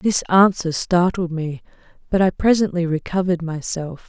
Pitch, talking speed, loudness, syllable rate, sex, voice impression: 175 Hz, 130 wpm, -19 LUFS, 4.8 syllables/s, female, feminine, adult-like, slightly dark, slightly clear, slightly intellectual, calm